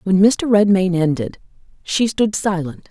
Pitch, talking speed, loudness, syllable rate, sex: 190 Hz, 145 wpm, -17 LUFS, 4.2 syllables/s, female